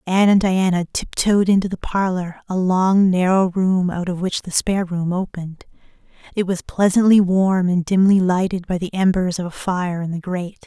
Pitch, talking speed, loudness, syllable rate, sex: 185 Hz, 190 wpm, -18 LUFS, 5.1 syllables/s, female